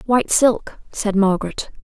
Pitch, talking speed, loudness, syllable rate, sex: 215 Hz, 130 wpm, -18 LUFS, 4.7 syllables/s, female